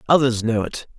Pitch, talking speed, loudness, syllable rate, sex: 120 Hz, 185 wpm, -20 LUFS, 5.5 syllables/s, male